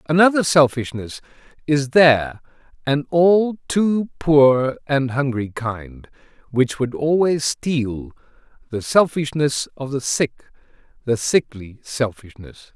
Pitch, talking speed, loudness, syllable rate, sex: 140 Hz, 105 wpm, -19 LUFS, 3.7 syllables/s, male